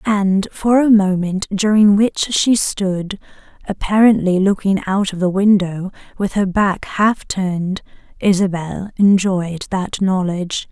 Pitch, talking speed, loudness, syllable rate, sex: 195 Hz, 130 wpm, -16 LUFS, 3.9 syllables/s, female